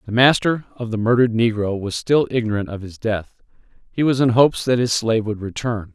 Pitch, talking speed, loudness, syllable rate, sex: 115 Hz, 210 wpm, -19 LUFS, 5.8 syllables/s, male